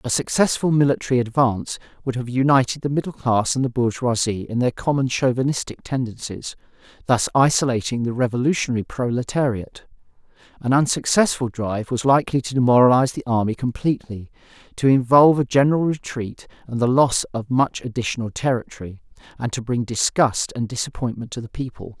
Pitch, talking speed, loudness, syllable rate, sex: 125 Hz, 145 wpm, -20 LUFS, 5.9 syllables/s, male